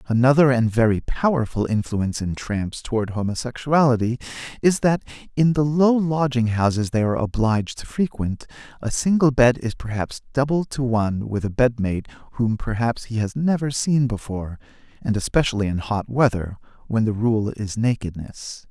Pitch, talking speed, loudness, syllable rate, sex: 120 Hz, 155 wpm, -22 LUFS, 5.2 syllables/s, male